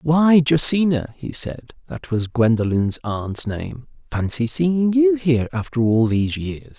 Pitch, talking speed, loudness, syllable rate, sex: 130 Hz, 135 wpm, -19 LUFS, 4.2 syllables/s, male